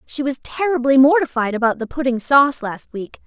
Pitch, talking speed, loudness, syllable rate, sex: 265 Hz, 185 wpm, -17 LUFS, 5.5 syllables/s, female